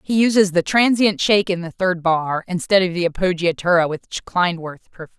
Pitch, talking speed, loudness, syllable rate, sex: 180 Hz, 185 wpm, -18 LUFS, 5.4 syllables/s, female